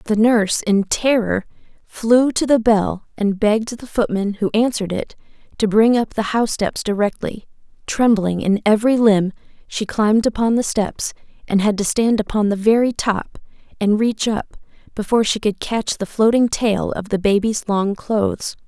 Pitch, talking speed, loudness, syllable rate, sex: 215 Hz, 175 wpm, -18 LUFS, 4.8 syllables/s, female